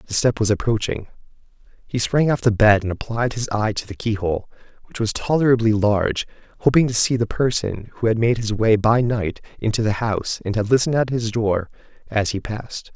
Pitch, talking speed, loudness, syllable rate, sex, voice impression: 110 Hz, 205 wpm, -20 LUFS, 5.6 syllables/s, male, masculine, adult-like, slightly bright, refreshing, sincere, slightly kind